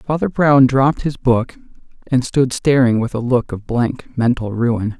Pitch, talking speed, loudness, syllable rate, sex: 125 Hz, 180 wpm, -16 LUFS, 4.2 syllables/s, male